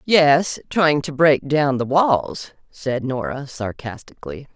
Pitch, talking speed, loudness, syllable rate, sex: 140 Hz, 130 wpm, -19 LUFS, 3.6 syllables/s, female